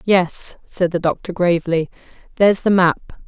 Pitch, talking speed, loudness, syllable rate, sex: 175 Hz, 145 wpm, -18 LUFS, 4.6 syllables/s, female